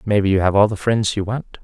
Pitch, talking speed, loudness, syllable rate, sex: 105 Hz, 330 wpm, -18 LUFS, 6.7 syllables/s, male